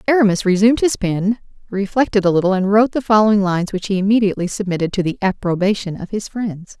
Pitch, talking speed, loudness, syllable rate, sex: 200 Hz, 195 wpm, -17 LUFS, 6.6 syllables/s, female